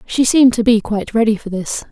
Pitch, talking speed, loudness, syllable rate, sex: 225 Hz, 250 wpm, -15 LUFS, 6.2 syllables/s, female